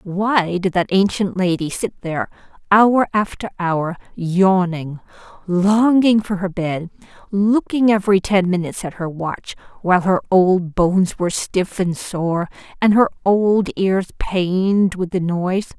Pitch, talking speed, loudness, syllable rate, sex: 190 Hz, 145 wpm, -18 LUFS, 4.1 syllables/s, female